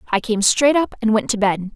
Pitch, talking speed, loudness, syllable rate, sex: 225 Hz, 275 wpm, -17 LUFS, 5.2 syllables/s, female